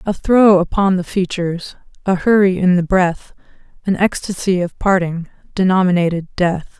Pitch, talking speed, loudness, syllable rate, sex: 185 Hz, 140 wpm, -16 LUFS, 4.9 syllables/s, female